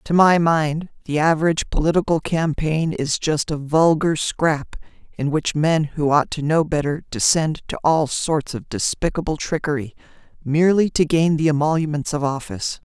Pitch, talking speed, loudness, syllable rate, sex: 155 Hz, 160 wpm, -20 LUFS, 4.8 syllables/s, female